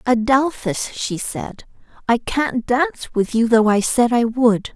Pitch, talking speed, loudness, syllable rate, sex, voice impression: 235 Hz, 165 wpm, -18 LUFS, 3.8 syllables/s, female, feminine, slightly adult-like, tensed, clear, refreshing, slightly lively